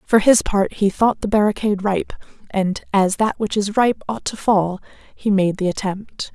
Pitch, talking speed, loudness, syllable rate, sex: 205 Hz, 200 wpm, -19 LUFS, 4.5 syllables/s, female